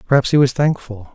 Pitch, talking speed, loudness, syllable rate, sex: 130 Hz, 210 wpm, -16 LUFS, 6.2 syllables/s, male